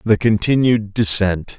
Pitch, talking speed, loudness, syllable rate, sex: 105 Hz, 115 wpm, -16 LUFS, 4.1 syllables/s, male